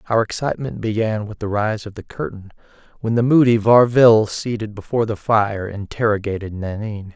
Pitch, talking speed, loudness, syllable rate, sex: 110 Hz, 160 wpm, -19 LUFS, 5.6 syllables/s, male